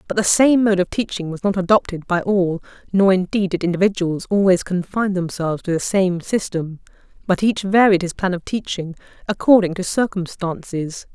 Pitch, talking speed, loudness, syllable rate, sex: 185 Hz, 170 wpm, -19 LUFS, 5.3 syllables/s, female